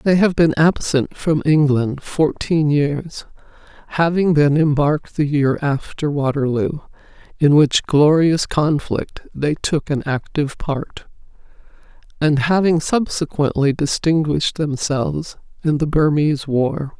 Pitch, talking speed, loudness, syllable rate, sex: 150 Hz, 115 wpm, -18 LUFS, 4.0 syllables/s, female